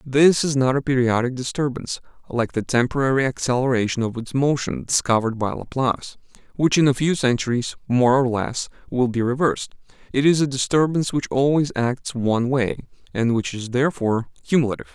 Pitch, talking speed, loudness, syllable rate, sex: 130 Hz, 165 wpm, -21 LUFS, 5.8 syllables/s, male